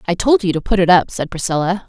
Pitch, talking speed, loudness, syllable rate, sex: 185 Hz, 285 wpm, -16 LUFS, 6.4 syllables/s, female